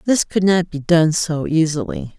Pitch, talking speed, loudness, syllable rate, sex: 165 Hz, 190 wpm, -18 LUFS, 4.4 syllables/s, female